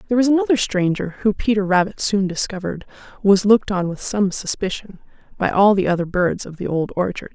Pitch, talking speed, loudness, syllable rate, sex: 200 Hz, 195 wpm, -19 LUFS, 5.9 syllables/s, female